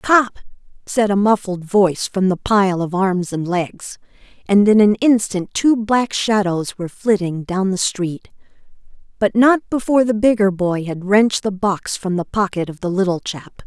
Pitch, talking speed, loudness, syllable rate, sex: 200 Hz, 180 wpm, -17 LUFS, 4.6 syllables/s, female